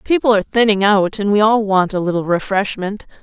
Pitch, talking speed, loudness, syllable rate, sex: 205 Hz, 205 wpm, -16 LUFS, 5.7 syllables/s, female